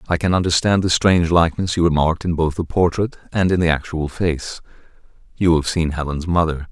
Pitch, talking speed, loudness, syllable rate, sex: 85 Hz, 195 wpm, -18 LUFS, 5.8 syllables/s, male